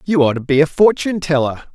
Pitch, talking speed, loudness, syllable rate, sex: 160 Hz, 240 wpm, -16 LUFS, 6.3 syllables/s, male